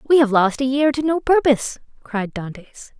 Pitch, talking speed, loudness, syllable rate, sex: 255 Hz, 200 wpm, -18 LUFS, 5.0 syllables/s, female